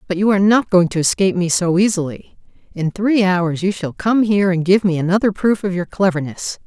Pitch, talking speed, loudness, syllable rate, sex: 185 Hz, 225 wpm, -17 LUFS, 5.7 syllables/s, female